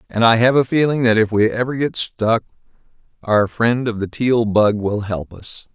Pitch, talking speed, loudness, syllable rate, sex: 115 Hz, 210 wpm, -17 LUFS, 4.6 syllables/s, male